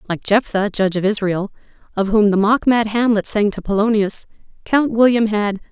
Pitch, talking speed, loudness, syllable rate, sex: 210 Hz, 180 wpm, -17 LUFS, 5.2 syllables/s, female